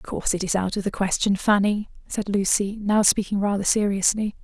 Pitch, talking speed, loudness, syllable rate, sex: 200 Hz, 205 wpm, -22 LUFS, 5.6 syllables/s, female